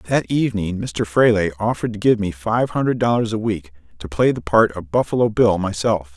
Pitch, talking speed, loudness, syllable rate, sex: 105 Hz, 205 wpm, -19 LUFS, 5.4 syllables/s, male